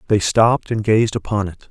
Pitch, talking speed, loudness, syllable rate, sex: 105 Hz, 210 wpm, -17 LUFS, 5.3 syllables/s, male